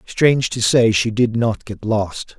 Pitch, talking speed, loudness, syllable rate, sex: 115 Hz, 200 wpm, -18 LUFS, 4.0 syllables/s, male